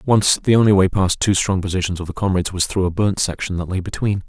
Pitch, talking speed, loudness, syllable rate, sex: 95 Hz, 265 wpm, -18 LUFS, 6.3 syllables/s, male